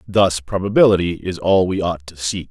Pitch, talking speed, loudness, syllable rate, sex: 90 Hz, 190 wpm, -18 LUFS, 5.1 syllables/s, male